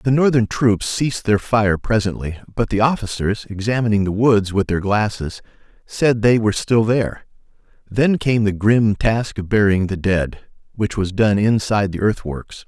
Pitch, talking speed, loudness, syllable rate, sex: 105 Hz, 170 wpm, -18 LUFS, 4.7 syllables/s, male